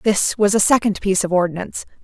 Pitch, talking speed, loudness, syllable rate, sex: 200 Hz, 205 wpm, -17 LUFS, 6.0 syllables/s, female